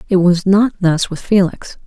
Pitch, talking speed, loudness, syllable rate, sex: 185 Hz, 195 wpm, -14 LUFS, 4.4 syllables/s, female